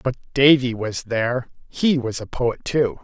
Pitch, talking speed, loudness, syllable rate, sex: 125 Hz, 180 wpm, -21 LUFS, 4.5 syllables/s, male